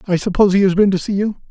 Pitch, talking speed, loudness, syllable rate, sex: 195 Hz, 320 wpm, -15 LUFS, 7.7 syllables/s, male